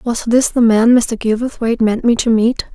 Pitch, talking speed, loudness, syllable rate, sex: 230 Hz, 220 wpm, -14 LUFS, 4.8 syllables/s, female